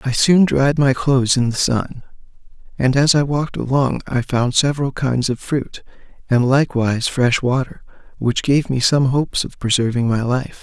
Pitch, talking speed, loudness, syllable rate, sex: 130 Hz, 180 wpm, -17 LUFS, 4.9 syllables/s, male